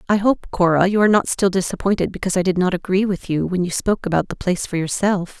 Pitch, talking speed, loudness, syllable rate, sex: 185 Hz, 255 wpm, -19 LUFS, 6.7 syllables/s, female